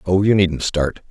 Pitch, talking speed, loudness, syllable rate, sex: 90 Hz, 220 wpm, -18 LUFS, 4.3 syllables/s, male